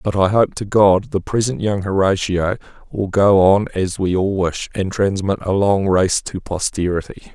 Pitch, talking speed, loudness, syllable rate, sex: 95 Hz, 190 wpm, -17 LUFS, 4.6 syllables/s, male